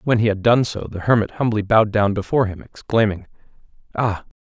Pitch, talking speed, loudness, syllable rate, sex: 105 Hz, 175 wpm, -19 LUFS, 6.1 syllables/s, male